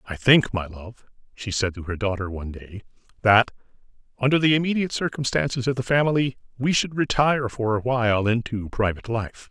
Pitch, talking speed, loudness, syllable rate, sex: 115 Hz, 175 wpm, -23 LUFS, 5.9 syllables/s, male